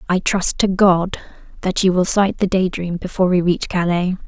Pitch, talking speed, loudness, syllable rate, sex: 185 Hz, 210 wpm, -18 LUFS, 5.0 syllables/s, female